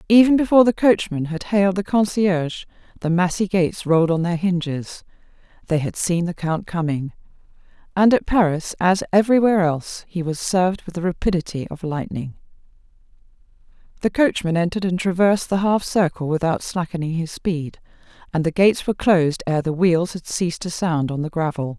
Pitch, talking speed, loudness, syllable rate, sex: 175 Hz, 170 wpm, -20 LUFS, 5.7 syllables/s, female